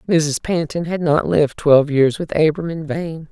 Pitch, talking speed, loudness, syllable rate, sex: 160 Hz, 200 wpm, -18 LUFS, 4.8 syllables/s, female